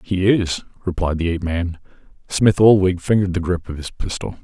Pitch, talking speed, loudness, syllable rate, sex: 90 Hz, 190 wpm, -19 LUFS, 5.5 syllables/s, male